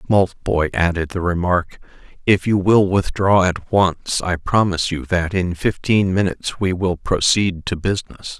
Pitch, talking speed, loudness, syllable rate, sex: 90 Hz, 155 wpm, -18 LUFS, 4.4 syllables/s, male